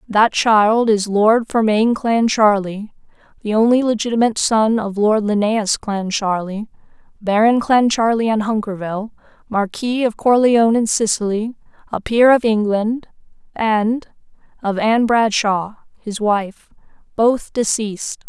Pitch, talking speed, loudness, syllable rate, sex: 220 Hz, 115 wpm, -17 LUFS, 4.1 syllables/s, female